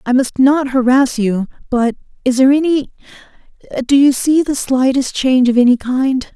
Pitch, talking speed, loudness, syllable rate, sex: 260 Hz, 160 wpm, -14 LUFS, 4.9 syllables/s, female